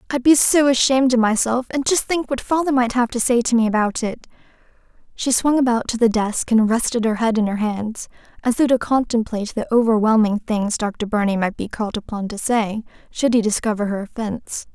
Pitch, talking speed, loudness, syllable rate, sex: 230 Hz, 210 wpm, -19 LUFS, 5.6 syllables/s, female